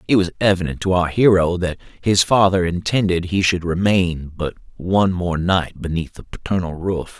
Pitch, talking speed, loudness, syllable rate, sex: 90 Hz, 175 wpm, -19 LUFS, 4.8 syllables/s, male